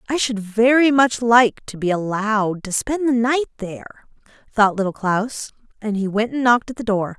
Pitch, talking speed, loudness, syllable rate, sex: 225 Hz, 200 wpm, -19 LUFS, 5.0 syllables/s, female